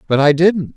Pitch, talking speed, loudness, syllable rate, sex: 160 Hz, 235 wpm, -14 LUFS, 5.1 syllables/s, male